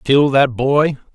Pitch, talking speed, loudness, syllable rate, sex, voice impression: 135 Hz, 155 wpm, -15 LUFS, 3.3 syllables/s, male, very masculine, slightly old, very thick, tensed, powerful, bright, hard, clear, fluent, cool, very intellectual, refreshing, sincere, very calm, very mature, very friendly, very reassuring, unique, elegant, wild, slightly sweet, lively, kind, slightly intense